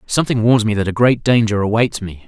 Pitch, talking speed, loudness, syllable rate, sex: 110 Hz, 240 wpm, -15 LUFS, 6.1 syllables/s, male